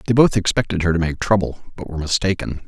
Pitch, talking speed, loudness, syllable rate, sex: 95 Hz, 225 wpm, -19 LUFS, 6.8 syllables/s, male